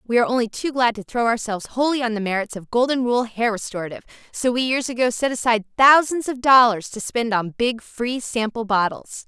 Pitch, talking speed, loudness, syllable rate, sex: 235 Hz, 215 wpm, -20 LUFS, 5.8 syllables/s, female